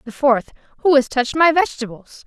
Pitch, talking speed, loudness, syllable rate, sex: 270 Hz, 185 wpm, -17 LUFS, 6.0 syllables/s, female